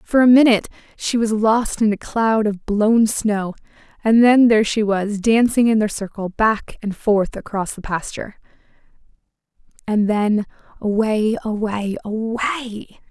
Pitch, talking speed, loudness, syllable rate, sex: 215 Hz, 145 wpm, -18 LUFS, 4.5 syllables/s, female